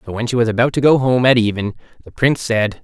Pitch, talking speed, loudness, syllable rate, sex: 115 Hz, 275 wpm, -16 LUFS, 6.7 syllables/s, male